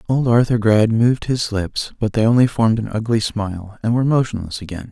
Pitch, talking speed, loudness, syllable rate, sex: 110 Hz, 210 wpm, -18 LUFS, 6.0 syllables/s, male